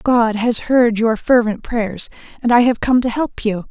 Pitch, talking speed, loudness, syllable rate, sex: 230 Hz, 210 wpm, -16 LUFS, 4.3 syllables/s, female